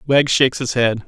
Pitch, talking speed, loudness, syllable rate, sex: 125 Hz, 225 wpm, -16 LUFS, 4.9 syllables/s, male